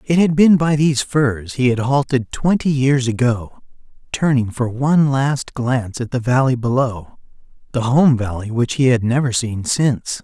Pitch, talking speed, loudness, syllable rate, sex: 130 Hz, 175 wpm, -17 LUFS, 4.6 syllables/s, male